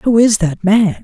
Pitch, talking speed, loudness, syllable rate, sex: 205 Hz, 230 wpm, -13 LUFS, 4.0 syllables/s, male